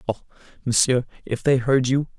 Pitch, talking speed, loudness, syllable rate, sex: 125 Hz, 165 wpm, -21 LUFS, 5.2 syllables/s, male